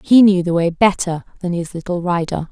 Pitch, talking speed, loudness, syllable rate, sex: 175 Hz, 215 wpm, -17 LUFS, 5.3 syllables/s, female